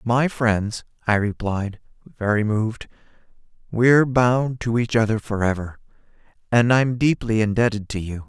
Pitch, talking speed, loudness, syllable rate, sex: 110 Hz, 130 wpm, -21 LUFS, 4.6 syllables/s, male